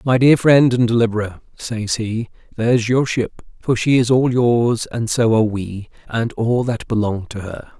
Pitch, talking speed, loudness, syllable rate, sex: 115 Hz, 195 wpm, -17 LUFS, 4.5 syllables/s, male